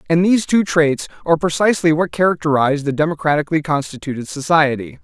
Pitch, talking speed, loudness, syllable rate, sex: 160 Hz, 145 wpm, -17 LUFS, 6.7 syllables/s, male